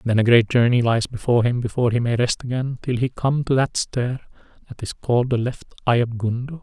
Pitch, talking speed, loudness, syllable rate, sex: 120 Hz, 235 wpm, -21 LUFS, 5.9 syllables/s, male